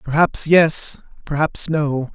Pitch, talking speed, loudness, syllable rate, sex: 150 Hz, 110 wpm, -17 LUFS, 3.3 syllables/s, male